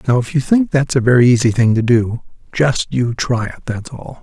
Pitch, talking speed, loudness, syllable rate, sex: 125 Hz, 240 wpm, -15 LUFS, 5.1 syllables/s, male